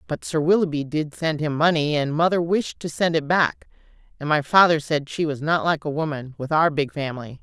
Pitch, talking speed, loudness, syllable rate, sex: 155 Hz, 220 wpm, -22 LUFS, 5.4 syllables/s, female